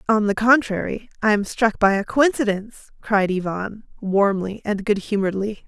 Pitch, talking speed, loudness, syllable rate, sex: 210 Hz, 160 wpm, -20 LUFS, 5.0 syllables/s, female